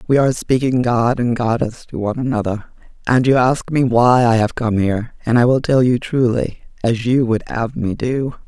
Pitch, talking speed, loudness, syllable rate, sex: 120 Hz, 210 wpm, -17 LUFS, 5.1 syllables/s, female